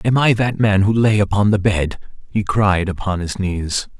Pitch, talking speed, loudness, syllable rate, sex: 100 Hz, 210 wpm, -17 LUFS, 4.6 syllables/s, male